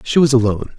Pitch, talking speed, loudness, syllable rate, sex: 125 Hz, 230 wpm, -15 LUFS, 7.4 syllables/s, male